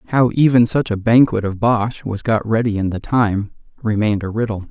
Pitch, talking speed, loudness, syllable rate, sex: 110 Hz, 205 wpm, -17 LUFS, 5.2 syllables/s, male